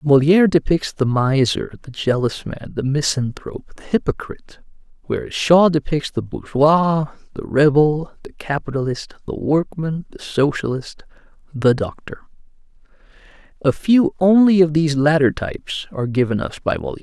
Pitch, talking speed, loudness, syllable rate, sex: 150 Hz, 135 wpm, -18 LUFS, 5.0 syllables/s, male